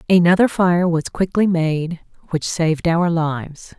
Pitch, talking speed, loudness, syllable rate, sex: 170 Hz, 145 wpm, -18 LUFS, 4.2 syllables/s, female